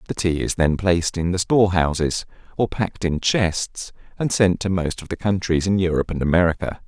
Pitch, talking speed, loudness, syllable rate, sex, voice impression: 90 Hz, 210 wpm, -21 LUFS, 5.6 syllables/s, male, masculine, adult-like, slightly thick, slightly fluent, cool, intellectual